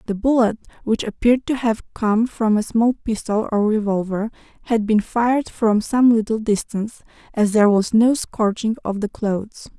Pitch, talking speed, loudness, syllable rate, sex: 220 Hz, 170 wpm, -19 LUFS, 4.9 syllables/s, female